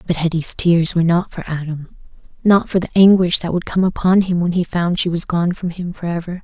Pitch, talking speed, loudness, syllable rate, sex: 175 Hz, 235 wpm, -17 LUFS, 5.6 syllables/s, female